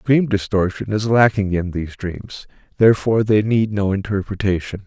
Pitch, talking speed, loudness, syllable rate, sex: 100 Hz, 150 wpm, -18 LUFS, 5.2 syllables/s, male